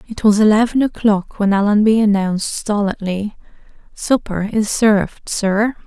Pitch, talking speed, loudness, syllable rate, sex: 210 Hz, 125 wpm, -16 LUFS, 4.5 syllables/s, female